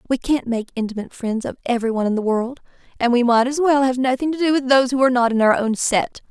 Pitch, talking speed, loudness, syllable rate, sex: 245 Hz, 275 wpm, -19 LUFS, 6.9 syllables/s, female